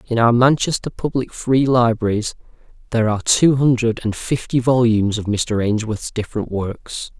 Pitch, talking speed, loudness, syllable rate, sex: 115 Hz, 150 wpm, -18 LUFS, 5.0 syllables/s, male